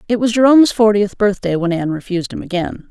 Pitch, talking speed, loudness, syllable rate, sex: 205 Hz, 205 wpm, -15 LUFS, 6.6 syllables/s, female